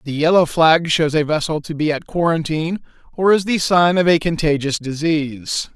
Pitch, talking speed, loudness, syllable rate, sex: 160 Hz, 190 wpm, -17 LUFS, 5.1 syllables/s, male